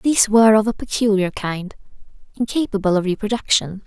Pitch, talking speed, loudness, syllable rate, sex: 210 Hz, 140 wpm, -18 LUFS, 5.9 syllables/s, female